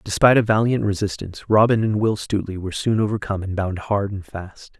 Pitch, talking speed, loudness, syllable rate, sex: 100 Hz, 200 wpm, -20 LUFS, 6.3 syllables/s, male